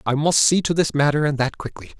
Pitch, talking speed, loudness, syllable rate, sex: 150 Hz, 270 wpm, -19 LUFS, 6.0 syllables/s, male